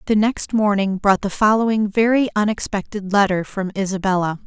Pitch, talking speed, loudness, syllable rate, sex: 205 Hz, 150 wpm, -19 LUFS, 5.3 syllables/s, female